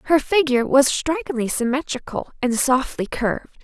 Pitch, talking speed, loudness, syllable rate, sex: 270 Hz, 130 wpm, -20 LUFS, 4.9 syllables/s, female